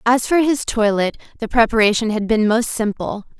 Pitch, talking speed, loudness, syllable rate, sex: 225 Hz, 175 wpm, -17 LUFS, 5.1 syllables/s, female